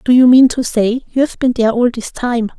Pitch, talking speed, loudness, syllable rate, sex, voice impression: 240 Hz, 255 wpm, -13 LUFS, 5.5 syllables/s, female, feminine, slightly young, slightly soft, cute, friendly, slightly kind